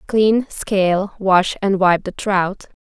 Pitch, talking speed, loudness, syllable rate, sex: 195 Hz, 150 wpm, -17 LUFS, 3.3 syllables/s, female